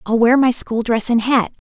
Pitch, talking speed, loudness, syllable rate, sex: 235 Hz, 250 wpm, -16 LUFS, 4.9 syllables/s, female